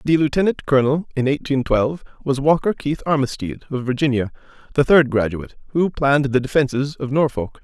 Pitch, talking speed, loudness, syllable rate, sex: 140 Hz, 155 wpm, -19 LUFS, 5.9 syllables/s, male